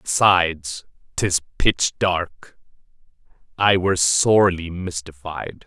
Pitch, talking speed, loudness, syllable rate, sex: 85 Hz, 85 wpm, -20 LUFS, 3.6 syllables/s, male